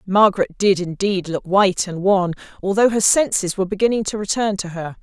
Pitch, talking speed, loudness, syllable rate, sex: 195 Hz, 190 wpm, -19 LUFS, 5.7 syllables/s, female